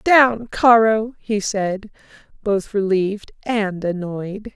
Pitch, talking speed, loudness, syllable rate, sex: 210 Hz, 105 wpm, -19 LUFS, 3.1 syllables/s, female